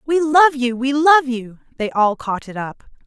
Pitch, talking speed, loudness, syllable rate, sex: 260 Hz, 215 wpm, -17 LUFS, 4.3 syllables/s, female